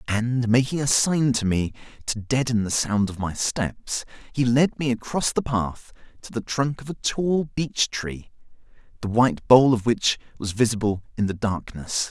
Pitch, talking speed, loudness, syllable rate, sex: 120 Hz, 185 wpm, -23 LUFS, 4.4 syllables/s, male